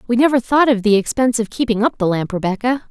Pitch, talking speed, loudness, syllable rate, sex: 230 Hz, 250 wpm, -17 LUFS, 6.6 syllables/s, female